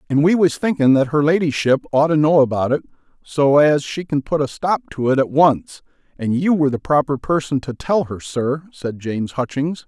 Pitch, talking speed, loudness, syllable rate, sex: 145 Hz, 220 wpm, -18 LUFS, 5.2 syllables/s, male